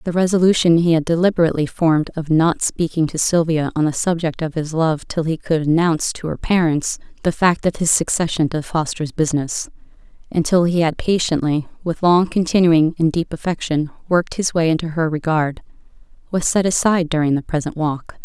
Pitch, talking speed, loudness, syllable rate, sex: 165 Hz, 185 wpm, -18 LUFS, 5.5 syllables/s, female